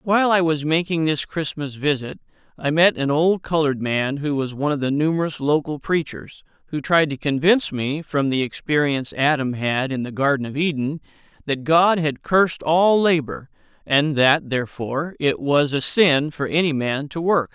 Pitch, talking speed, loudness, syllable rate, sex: 150 Hz, 185 wpm, -20 LUFS, 5.0 syllables/s, male